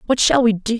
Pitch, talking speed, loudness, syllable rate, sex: 230 Hz, 305 wpm, -16 LUFS, 6.4 syllables/s, female